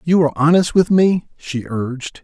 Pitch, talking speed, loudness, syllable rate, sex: 155 Hz, 190 wpm, -17 LUFS, 5.0 syllables/s, male